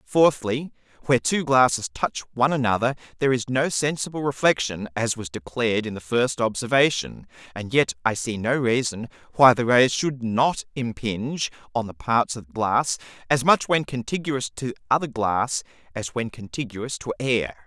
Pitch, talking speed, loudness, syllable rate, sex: 120 Hz, 165 wpm, -23 LUFS, 4.8 syllables/s, male